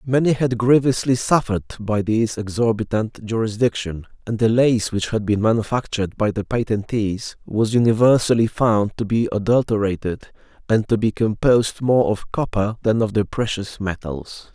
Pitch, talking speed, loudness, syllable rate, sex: 110 Hz, 150 wpm, -20 LUFS, 4.9 syllables/s, male